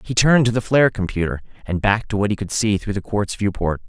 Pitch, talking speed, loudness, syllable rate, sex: 105 Hz, 265 wpm, -20 LUFS, 6.3 syllables/s, male